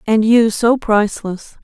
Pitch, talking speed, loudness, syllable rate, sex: 215 Hz, 145 wpm, -14 LUFS, 4.1 syllables/s, female